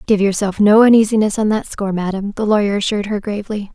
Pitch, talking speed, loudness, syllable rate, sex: 205 Hz, 210 wpm, -16 LUFS, 6.7 syllables/s, female